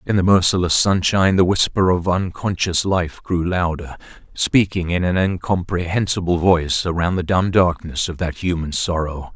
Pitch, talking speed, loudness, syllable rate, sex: 90 Hz, 155 wpm, -18 LUFS, 4.8 syllables/s, male